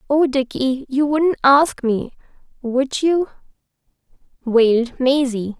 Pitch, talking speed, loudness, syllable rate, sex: 265 Hz, 95 wpm, -18 LUFS, 3.6 syllables/s, female